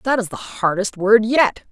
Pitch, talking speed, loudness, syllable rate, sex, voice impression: 220 Hz, 210 wpm, -17 LUFS, 4.4 syllables/s, female, feminine, middle-aged, slightly bright, muffled, raspy, slightly intellectual, slightly friendly, unique, slightly elegant, slightly strict, slightly sharp